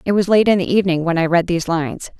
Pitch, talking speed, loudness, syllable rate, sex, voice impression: 180 Hz, 300 wpm, -17 LUFS, 7.4 syllables/s, female, very feminine, very middle-aged, very thin, very tensed, powerful, bright, slightly soft, very clear, very fluent, raspy, slightly cool, intellectual, refreshing, slightly sincere, slightly calm, slightly friendly, slightly reassuring, unique, slightly elegant, wild, slightly sweet, lively, strict, intense, sharp, slightly light